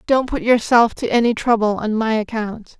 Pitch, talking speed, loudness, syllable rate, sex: 225 Hz, 195 wpm, -18 LUFS, 4.9 syllables/s, female